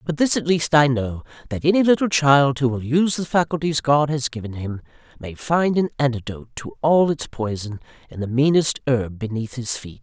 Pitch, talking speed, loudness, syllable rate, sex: 140 Hz, 205 wpm, -20 LUFS, 5.2 syllables/s, male